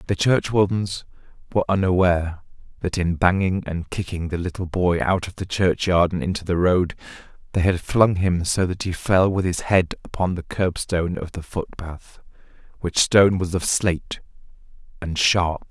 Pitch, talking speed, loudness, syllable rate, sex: 90 Hz, 170 wpm, -21 LUFS, 4.9 syllables/s, male